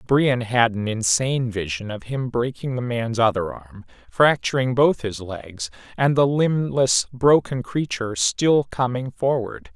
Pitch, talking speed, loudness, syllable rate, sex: 120 Hz, 150 wpm, -21 LUFS, 4.1 syllables/s, male